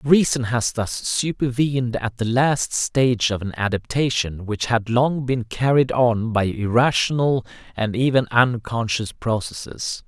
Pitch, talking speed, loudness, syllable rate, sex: 120 Hz, 135 wpm, -21 LUFS, 4.2 syllables/s, male